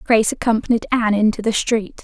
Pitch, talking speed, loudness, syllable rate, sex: 220 Hz, 175 wpm, -18 LUFS, 6.5 syllables/s, female